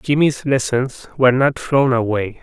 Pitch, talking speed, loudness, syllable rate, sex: 130 Hz, 150 wpm, -17 LUFS, 4.3 syllables/s, male